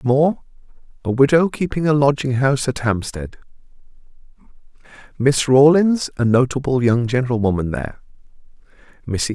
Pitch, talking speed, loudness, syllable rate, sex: 130 Hz, 110 wpm, -17 LUFS, 5.2 syllables/s, male